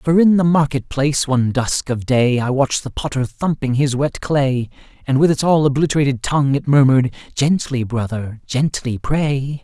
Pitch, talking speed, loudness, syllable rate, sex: 135 Hz, 175 wpm, -17 LUFS, 4.8 syllables/s, male